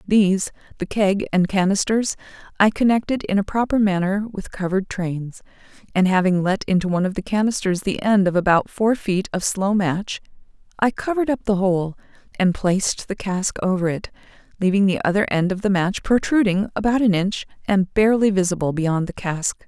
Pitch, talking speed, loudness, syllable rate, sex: 195 Hz, 175 wpm, -20 LUFS, 5.3 syllables/s, female